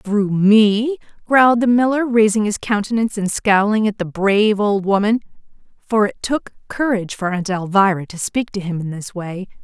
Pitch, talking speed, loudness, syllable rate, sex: 210 Hz, 175 wpm, -17 LUFS, 5.0 syllables/s, female